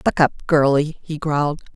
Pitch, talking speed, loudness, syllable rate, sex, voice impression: 150 Hz, 170 wpm, -19 LUFS, 4.7 syllables/s, female, feminine, adult-like, slightly fluent, sincere, friendly